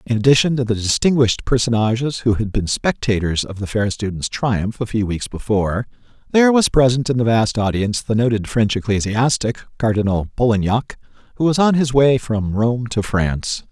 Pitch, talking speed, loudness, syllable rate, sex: 115 Hz, 180 wpm, -18 LUFS, 5.4 syllables/s, male